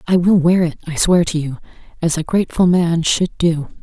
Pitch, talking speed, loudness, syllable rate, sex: 170 Hz, 220 wpm, -16 LUFS, 5.2 syllables/s, female